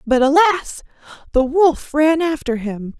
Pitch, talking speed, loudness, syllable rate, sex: 290 Hz, 140 wpm, -17 LUFS, 3.9 syllables/s, female